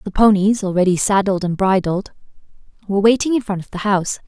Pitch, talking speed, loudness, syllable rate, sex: 200 Hz, 180 wpm, -17 LUFS, 6.3 syllables/s, female